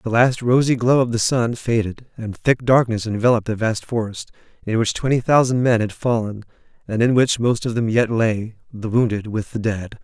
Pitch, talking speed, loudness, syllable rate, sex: 115 Hz, 210 wpm, -19 LUFS, 5.2 syllables/s, male